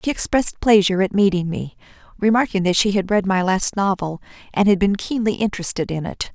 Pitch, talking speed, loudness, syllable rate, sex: 195 Hz, 200 wpm, -19 LUFS, 6.0 syllables/s, female